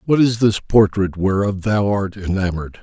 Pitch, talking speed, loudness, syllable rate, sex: 100 Hz, 170 wpm, -18 LUFS, 4.9 syllables/s, male